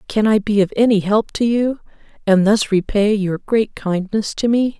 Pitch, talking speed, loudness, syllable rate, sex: 210 Hz, 200 wpm, -17 LUFS, 4.6 syllables/s, female